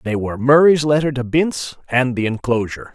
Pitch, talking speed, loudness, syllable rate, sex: 130 Hz, 185 wpm, -17 LUFS, 5.9 syllables/s, male